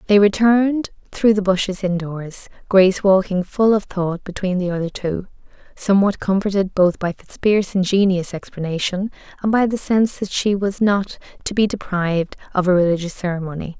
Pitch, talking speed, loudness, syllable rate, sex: 190 Hz, 160 wpm, -19 LUFS, 5.2 syllables/s, female